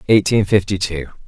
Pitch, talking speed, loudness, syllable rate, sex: 95 Hz, 140 wpm, -17 LUFS, 5.3 syllables/s, male